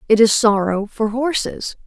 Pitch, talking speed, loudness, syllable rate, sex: 225 Hz, 160 wpm, -17 LUFS, 4.4 syllables/s, female